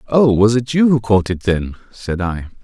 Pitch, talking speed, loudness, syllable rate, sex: 110 Hz, 230 wpm, -16 LUFS, 4.6 syllables/s, male